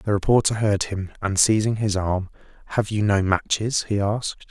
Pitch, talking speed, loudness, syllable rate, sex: 105 Hz, 185 wpm, -22 LUFS, 4.9 syllables/s, male